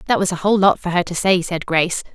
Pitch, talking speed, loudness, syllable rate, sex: 180 Hz, 305 wpm, -18 LUFS, 6.8 syllables/s, female